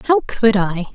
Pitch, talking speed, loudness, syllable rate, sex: 220 Hz, 190 wpm, -17 LUFS, 4.2 syllables/s, female